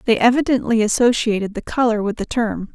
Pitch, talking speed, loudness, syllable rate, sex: 225 Hz, 175 wpm, -18 LUFS, 5.8 syllables/s, female